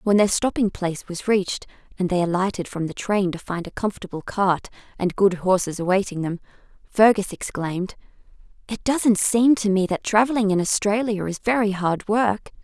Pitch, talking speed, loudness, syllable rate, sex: 200 Hz, 175 wpm, -22 LUFS, 5.2 syllables/s, female